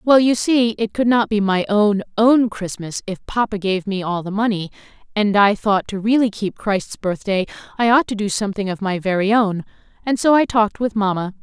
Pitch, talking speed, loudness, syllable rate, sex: 210 Hz, 215 wpm, -18 LUFS, 5.1 syllables/s, female